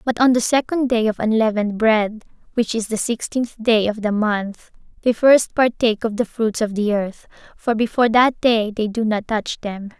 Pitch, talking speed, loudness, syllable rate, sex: 225 Hz, 205 wpm, -19 LUFS, 4.9 syllables/s, female